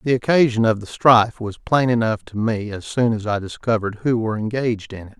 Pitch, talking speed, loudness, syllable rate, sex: 110 Hz, 230 wpm, -19 LUFS, 6.1 syllables/s, male